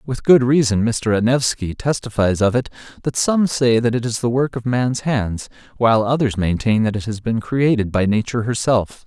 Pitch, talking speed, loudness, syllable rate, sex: 120 Hz, 200 wpm, -18 LUFS, 5.1 syllables/s, male